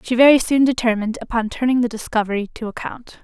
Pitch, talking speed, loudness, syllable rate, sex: 235 Hz, 185 wpm, -18 LUFS, 6.6 syllables/s, female